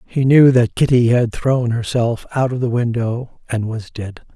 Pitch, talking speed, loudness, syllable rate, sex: 120 Hz, 195 wpm, -17 LUFS, 4.3 syllables/s, male